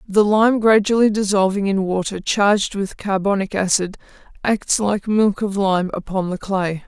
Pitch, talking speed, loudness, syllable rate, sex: 200 Hz, 155 wpm, -18 LUFS, 4.5 syllables/s, female